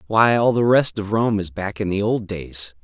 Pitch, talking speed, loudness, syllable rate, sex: 105 Hz, 255 wpm, -20 LUFS, 4.6 syllables/s, male